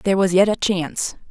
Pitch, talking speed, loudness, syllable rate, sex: 190 Hz, 230 wpm, -19 LUFS, 6.1 syllables/s, female